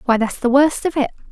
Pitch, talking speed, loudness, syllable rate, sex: 265 Hz, 275 wpm, -17 LUFS, 6.1 syllables/s, female